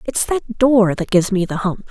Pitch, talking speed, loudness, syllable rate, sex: 210 Hz, 250 wpm, -17 LUFS, 5.0 syllables/s, female